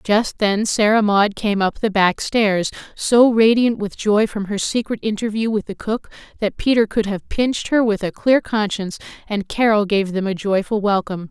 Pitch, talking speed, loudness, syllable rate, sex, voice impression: 210 Hz, 195 wpm, -18 LUFS, 4.8 syllables/s, female, feminine, adult-like, slightly clear, intellectual, slightly calm, slightly sharp